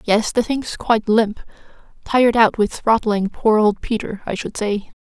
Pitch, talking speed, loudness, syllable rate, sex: 220 Hz, 180 wpm, -18 LUFS, 4.5 syllables/s, female